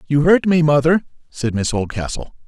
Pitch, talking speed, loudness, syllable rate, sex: 145 Hz, 170 wpm, -17 LUFS, 5.2 syllables/s, male